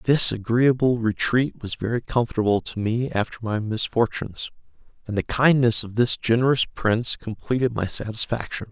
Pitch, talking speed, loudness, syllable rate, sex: 115 Hz, 145 wpm, -22 LUFS, 5.2 syllables/s, male